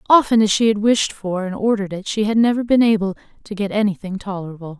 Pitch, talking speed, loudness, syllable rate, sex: 205 Hz, 225 wpm, -18 LUFS, 6.4 syllables/s, female